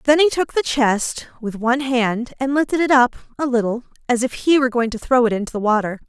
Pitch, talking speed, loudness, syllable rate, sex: 250 Hz, 245 wpm, -19 LUFS, 5.9 syllables/s, female